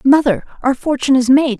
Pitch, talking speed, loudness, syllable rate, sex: 265 Hz, 190 wpm, -15 LUFS, 5.8 syllables/s, female